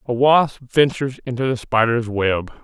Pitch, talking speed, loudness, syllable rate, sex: 125 Hz, 160 wpm, -19 LUFS, 4.5 syllables/s, male